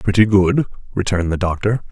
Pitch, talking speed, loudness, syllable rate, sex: 100 Hz, 155 wpm, -17 LUFS, 5.8 syllables/s, male